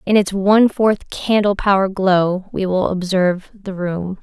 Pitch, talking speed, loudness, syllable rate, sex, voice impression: 190 Hz, 155 wpm, -17 LUFS, 4.3 syllables/s, female, very feminine, slightly young, very adult-like, thin, tensed, slightly powerful, bright, slightly soft, clear, fluent, very cute, intellectual, refreshing, very sincere, calm, friendly, reassuring, slightly unique, elegant, slightly wild, sweet, lively, slightly strict, slightly intense, modest, slightly light